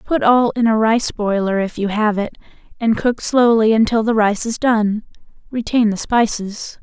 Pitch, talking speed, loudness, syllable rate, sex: 220 Hz, 185 wpm, -17 LUFS, 4.5 syllables/s, female